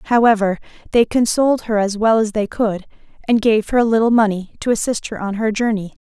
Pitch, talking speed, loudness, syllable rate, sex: 220 Hz, 210 wpm, -17 LUFS, 5.9 syllables/s, female